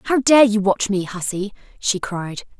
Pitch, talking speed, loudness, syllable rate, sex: 205 Hz, 185 wpm, -19 LUFS, 4.1 syllables/s, female